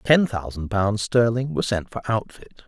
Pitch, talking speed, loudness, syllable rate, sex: 110 Hz, 180 wpm, -23 LUFS, 5.2 syllables/s, male